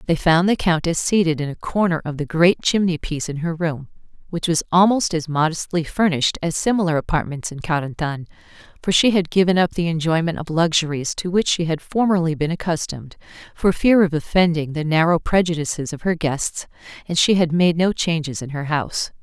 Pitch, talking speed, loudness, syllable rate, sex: 165 Hz, 195 wpm, -20 LUFS, 5.6 syllables/s, female